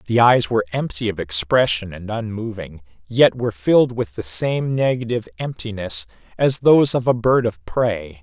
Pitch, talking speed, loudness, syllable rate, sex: 110 Hz, 170 wpm, -19 LUFS, 5.0 syllables/s, male